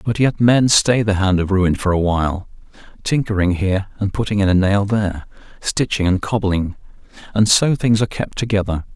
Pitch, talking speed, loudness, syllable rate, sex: 100 Hz, 190 wpm, -17 LUFS, 5.4 syllables/s, male